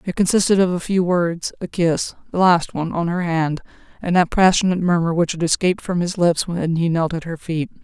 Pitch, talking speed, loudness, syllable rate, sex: 175 Hz, 215 wpm, -19 LUFS, 5.6 syllables/s, female